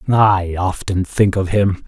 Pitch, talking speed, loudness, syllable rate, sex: 95 Hz, 160 wpm, -17 LUFS, 3.7 syllables/s, male